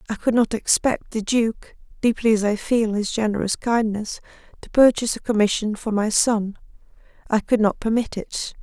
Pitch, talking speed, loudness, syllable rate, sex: 220 Hz, 175 wpm, -21 LUFS, 5.0 syllables/s, female